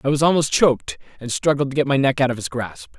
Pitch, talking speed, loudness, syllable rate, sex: 135 Hz, 280 wpm, -19 LUFS, 6.5 syllables/s, male